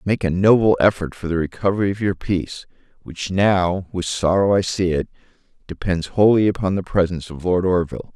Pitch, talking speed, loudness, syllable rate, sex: 95 Hz, 185 wpm, -19 LUFS, 5.5 syllables/s, male